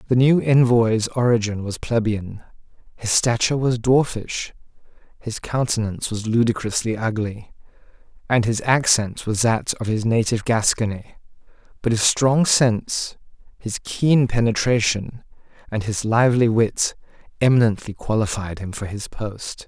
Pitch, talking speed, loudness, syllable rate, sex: 115 Hz, 125 wpm, -20 LUFS, 4.6 syllables/s, male